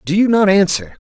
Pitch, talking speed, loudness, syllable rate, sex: 180 Hz, 225 wpm, -14 LUFS, 5.6 syllables/s, male